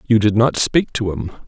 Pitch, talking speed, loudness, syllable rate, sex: 115 Hz, 245 wpm, -17 LUFS, 5.0 syllables/s, male